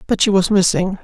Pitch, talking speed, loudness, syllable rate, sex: 195 Hz, 235 wpm, -15 LUFS, 5.8 syllables/s, female